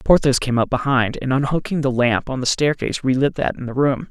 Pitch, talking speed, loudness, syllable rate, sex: 130 Hz, 235 wpm, -19 LUFS, 5.7 syllables/s, male